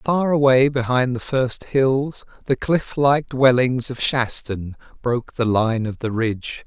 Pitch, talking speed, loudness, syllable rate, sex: 125 Hz, 160 wpm, -20 LUFS, 3.9 syllables/s, male